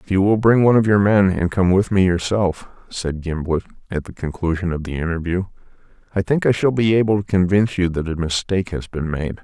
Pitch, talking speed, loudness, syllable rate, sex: 95 Hz, 230 wpm, -19 LUFS, 5.9 syllables/s, male